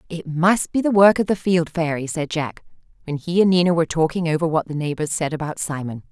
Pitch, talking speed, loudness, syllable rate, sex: 165 Hz, 235 wpm, -20 LUFS, 5.9 syllables/s, female